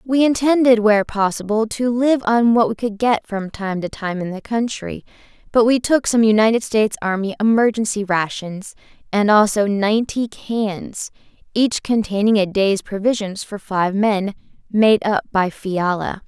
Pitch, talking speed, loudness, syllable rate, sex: 215 Hz, 160 wpm, -18 LUFS, 4.5 syllables/s, female